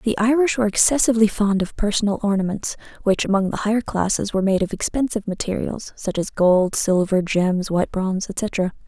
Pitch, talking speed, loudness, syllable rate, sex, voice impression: 205 Hz, 175 wpm, -20 LUFS, 5.8 syllables/s, female, feminine, adult-like, relaxed, slightly weak, soft, slightly raspy, intellectual, calm, friendly, reassuring, elegant, kind, modest